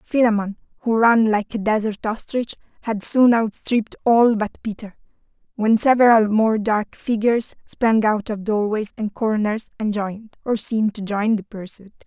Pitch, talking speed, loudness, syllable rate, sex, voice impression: 215 Hz, 160 wpm, -20 LUFS, 4.6 syllables/s, female, very feminine, slightly young, very thin, very tensed, powerful, slightly bright, slightly soft, clear, slightly halting, very cute, intellectual, refreshing, sincere, calm, very friendly, reassuring, slightly elegant, wild, sweet, lively, kind, very strict, sharp